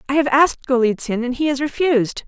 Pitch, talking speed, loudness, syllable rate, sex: 265 Hz, 210 wpm, -18 LUFS, 6.5 syllables/s, female